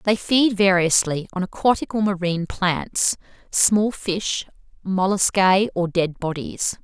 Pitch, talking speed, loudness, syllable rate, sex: 190 Hz, 125 wpm, -20 LUFS, 3.9 syllables/s, female